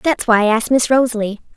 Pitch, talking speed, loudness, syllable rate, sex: 235 Hz, 230 wpm, -15 LUFS, 6.8 syllables/s, female